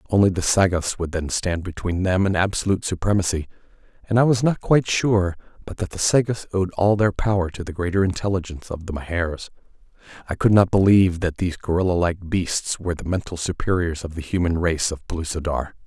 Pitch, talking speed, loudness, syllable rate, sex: 90 Hz, 190 wpm, -22 LUFS, 6.0 syllables/s, male